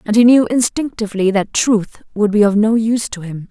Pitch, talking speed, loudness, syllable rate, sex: 215 Hz, 220 wpm, -15 LUFS, 5.4 syllables/s, female